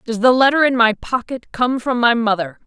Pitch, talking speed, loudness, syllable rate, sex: 240 Hz, 225 wpm, -16 LUFS, 5.2 syllables/s, female